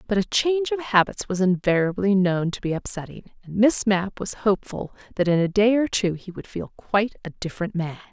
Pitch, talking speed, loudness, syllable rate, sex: 200 Hz, 215 wpm, -23 LUFS, 5.5 syllables/s, female